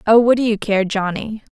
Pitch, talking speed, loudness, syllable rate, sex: 215 Hz, 235 wpm, -17 LUFS, 5.3 syllables/s, female